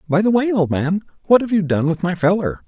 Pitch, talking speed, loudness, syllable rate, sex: 185 Hz, 270 wpm, -18 LUFS, 5.9 syllables/s, male